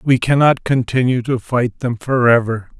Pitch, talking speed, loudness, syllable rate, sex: 125 Hz, 150 wpm, -16 LUFS, 4.6 syllables/s, male